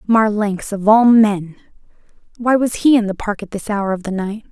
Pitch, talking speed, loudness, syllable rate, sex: 210 Hz, 215 wpm, -16 LUFS, 4.8 syllables/s, female